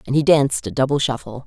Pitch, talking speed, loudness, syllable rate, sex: 130 Hz, 245 wpm, -19 LUFS, 6.7 syllables/s, female